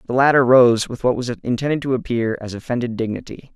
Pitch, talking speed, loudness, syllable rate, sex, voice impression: 120 Hz, 205 wpm, -18 LUFS, 6.1 syllables/s, male, masculine, adult-like, slightly refreshing, sincere, slightly elegant, slightly sweet